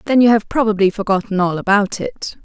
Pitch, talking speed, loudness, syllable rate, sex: 205 Hz, 195 wpm, -16 LUFS, 5.8 syllables/s, female